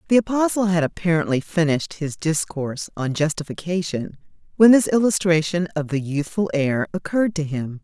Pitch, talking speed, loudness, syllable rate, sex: 170 Hz, 145 wpm, -21 LUFS, 5.4 syllables/s, female